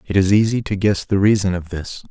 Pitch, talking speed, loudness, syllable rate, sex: 100 Hz, 255 wpm, -18 LUFS, 5.7 syllables/s, male